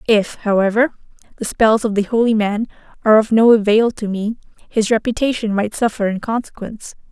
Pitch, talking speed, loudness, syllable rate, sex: 220 Hz, 170 wpm, -17 LUFS, 5.8 syllables/s, female